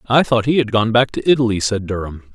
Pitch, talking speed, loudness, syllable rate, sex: 115 Hz, 255 wpm, -17 LUFS, 6.1 syllables/s, male